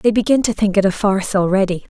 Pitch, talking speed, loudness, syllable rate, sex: 205 Hz, 240 wpm, -16 LUFS, 6.7 syllables/s, female